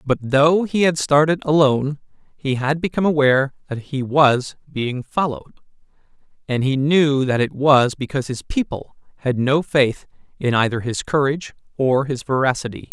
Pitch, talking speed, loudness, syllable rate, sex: 140 Hz, 160 wpm, -19 LUFS, 5.0 syllables/s, male